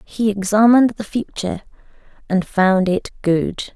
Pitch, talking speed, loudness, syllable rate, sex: 200 Hz, 130 wpm, -18 LUFS, 4.5 syllables/s, female